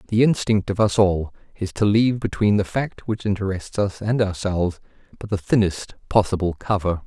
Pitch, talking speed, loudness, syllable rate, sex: 100 Hz, 180 wpm, -21 LUFS, 5.3 syllables/s, male